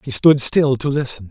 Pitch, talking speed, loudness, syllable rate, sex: 135 Hz, 230 wpm, -16 LUFS, 5.0 syllables/s, male